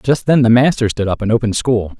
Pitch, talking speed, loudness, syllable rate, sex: 115 Hz, 270 wpm, -14 LUFS, 6.3 syllables/s, male